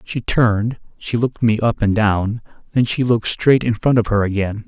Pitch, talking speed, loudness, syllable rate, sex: 110 Hz, 220 wpm, -18 LUFS, 5.2 syllables/s, male